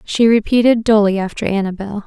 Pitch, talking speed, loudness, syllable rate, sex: 210 Hz, 145 wpm, -15 LUFS, 5.6 syllables/s, female